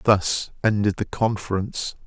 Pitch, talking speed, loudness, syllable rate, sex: 105 Hz, 115 wpm, -23 LUFS, 4.6 syllables/s, male